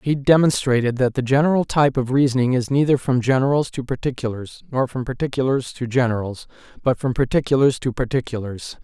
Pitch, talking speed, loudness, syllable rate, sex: 130 Hz, 165 wpm, -20 LUFS, 6.0 syllables/s, male